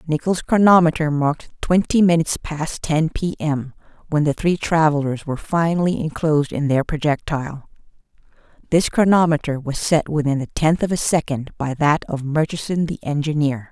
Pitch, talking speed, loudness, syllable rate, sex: 155 Hz, 155 wpm, -19 LUFS, 5.2 syllables/s, female